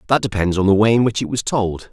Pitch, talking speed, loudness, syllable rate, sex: 105 Hz, 315 wpm, -17 LUFS, 6.4 syllables/s, male